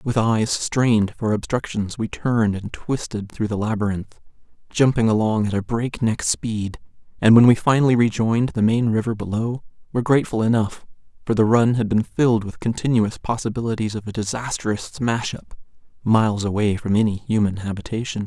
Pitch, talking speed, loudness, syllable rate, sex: 110 Hz, 165 wpm, -21 LUFS, 5.4 syllables/s, male